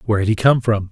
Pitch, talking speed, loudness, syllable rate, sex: 110 Hz, 325 wpm, -16 LUFS, 7.8 syllables/s, male